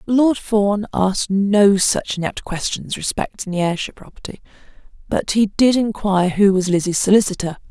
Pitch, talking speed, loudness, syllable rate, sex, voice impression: 200 Hz, 150 wpm, -18 LUFS, 5.0 syllables/s, female, very masculine, very adult-like, very middle-aged, slightly thick